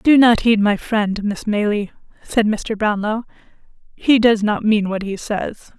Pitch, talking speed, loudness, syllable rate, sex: 215 Hz, 175 wpm, -18 LUFS, 4.1 syllables/s, female